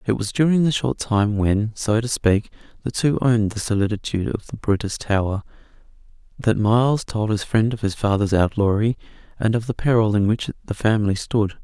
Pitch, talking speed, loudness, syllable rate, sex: 110 Hz, 190 wpm, -21 LUFS, 5.4 syllables/s, male